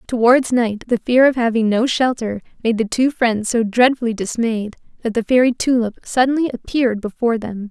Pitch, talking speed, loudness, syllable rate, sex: 235 Hz, 180 wpm, -17 LUFS, 5.4 syllables/s, female